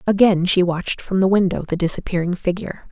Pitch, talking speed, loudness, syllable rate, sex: 185 Hz, 185 wpm, -19 LUFS, 6.3 syllables/s, female